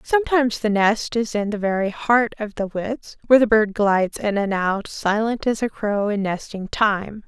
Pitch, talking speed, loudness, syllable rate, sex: 215 Hz, 205 wpm, -21 LUFS, 4.7 syllables/s, female